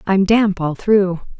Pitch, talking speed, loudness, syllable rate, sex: 195 Hz, 170 wpm, -16 LUFS, 3.6 syllables/s, female